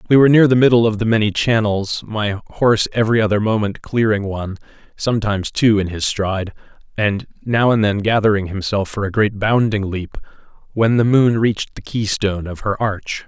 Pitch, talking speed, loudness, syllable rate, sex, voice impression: 105 Hz, 190 wpm, -17 LUFS, 5.5 syllables/s, male, masculine, very adult-like, cool, sincere, slightly mature, slightly wild, slightly sweet